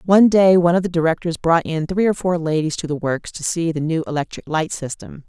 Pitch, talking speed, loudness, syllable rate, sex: 165 Hz, 250 wpm, -19 LUFS, 5.9 syllables/s, female